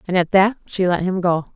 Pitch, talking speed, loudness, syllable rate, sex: 185 Hz, 270 wpm, -18 LUFS, 5.6 syllables/s, female